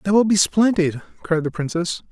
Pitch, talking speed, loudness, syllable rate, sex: 170 Hz, 200 wpm, -19 LUFS, 5.1 syllables/s, male